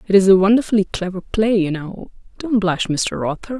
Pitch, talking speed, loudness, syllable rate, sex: 200 Hz, 200 wpm, -18 LUFS, 5.3 syllables/s, female